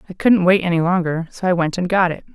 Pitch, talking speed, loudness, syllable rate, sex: 175 Hz, 280 wpm, -17 LUFS, 6.3 syllables/s, female